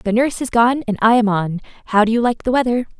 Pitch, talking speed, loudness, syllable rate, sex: 230 Hz, 260 wpm, -17 LUFS, 6.3 syllables/s, female